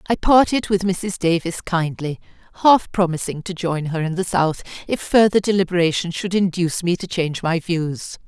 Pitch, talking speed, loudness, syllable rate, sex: 175 Hz, 175 wpm, -19 LUFS, 5.1 syllables/s, female